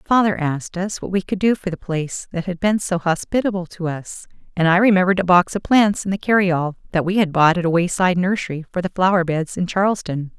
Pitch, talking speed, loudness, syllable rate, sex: 180 Hz, 235 wpm, -19 LUFS, 6.0 syllables/s, female